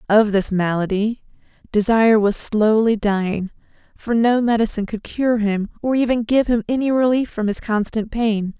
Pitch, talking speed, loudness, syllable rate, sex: 220 Hz, 160 wpm, -19 LUFS, 4.9 syllables/s, female